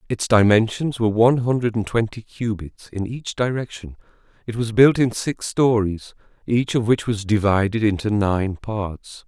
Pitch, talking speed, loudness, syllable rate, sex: 110 Hz, 160 wpm, -20 LUFS, 4.7 syllables/s, male